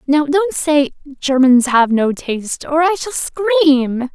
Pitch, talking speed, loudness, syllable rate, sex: 295 Hz, 160 wpm, -15 LUFS, 4.2 syllables/s, female